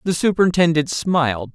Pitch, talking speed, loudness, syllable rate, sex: 155 Hz, 115 wpm, -18 LUFS, 5.6 syllables/s, male